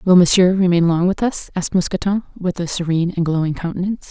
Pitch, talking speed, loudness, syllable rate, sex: 180 Hz, 205 wpm, -18 LUFS, 6.4 syllables/s, female